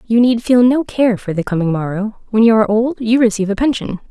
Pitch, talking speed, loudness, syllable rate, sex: 220 Hz, 250 wpm, -15 LUFS, 6.1 syllables/s, female